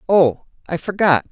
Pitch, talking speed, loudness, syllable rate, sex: 175 Hz, 135 wpm, -18 LUFS, 4.4 syllables/s, female